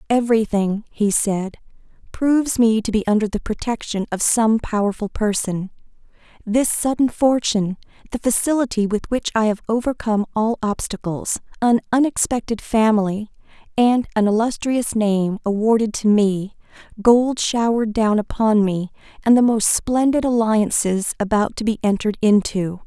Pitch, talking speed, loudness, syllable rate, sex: 220 Hz, 130 wpm, -19 LUFS, 4.8 syllables/s, female